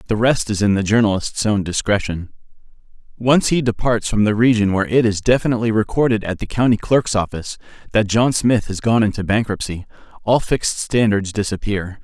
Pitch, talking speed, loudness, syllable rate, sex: 110 Hz, 175 wpm, -18 LUFS, 5.6 syllables/s, male